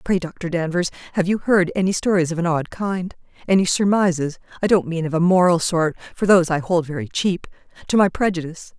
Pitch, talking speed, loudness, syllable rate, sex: 175 Hz, 190 wpm, -20 LUFS, 6.0 syllables/s, female